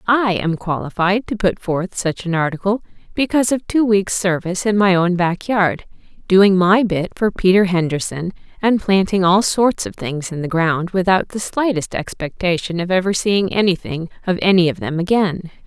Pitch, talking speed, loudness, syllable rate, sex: 185 Hz, 180 wpm, -17 LUFS, 4.9 syllables/s, female